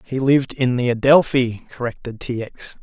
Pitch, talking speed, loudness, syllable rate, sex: 125 Hz, 170 wpm, -19 LUFS, 5.0 syllables/s, male